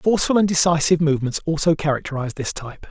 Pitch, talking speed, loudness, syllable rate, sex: 160 Hz, 145 wpm, -19 LUFS, 7.1 syllables/s, male